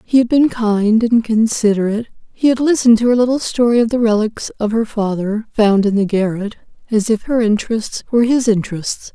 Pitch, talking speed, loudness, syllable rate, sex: 225 Hz, 195 wpm, -15 LUFS, 5.6 syllables/s, female